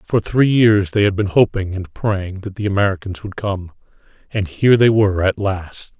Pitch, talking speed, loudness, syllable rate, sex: 100 Hz, 190 wpm, -17 LUFS, 5.0 syllables/s, male